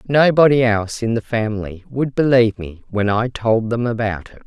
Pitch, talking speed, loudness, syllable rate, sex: 115 Hz, 190 wpm, -18 LUFS, 5.3 syllables/s, female